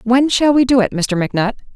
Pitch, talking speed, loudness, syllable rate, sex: 235 Hz, 240 wpm, -15 LUFS, 6.2 syllables/s, female